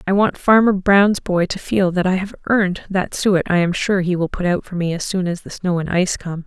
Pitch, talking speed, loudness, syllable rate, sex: 185 Hz, 280 wpm, -18 LUFS, 5.4 syllables/s, female